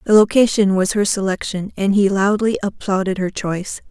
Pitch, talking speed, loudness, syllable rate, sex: 200 Hz, 170 wpm, -17 LUFS, 5.3 syllables/s, female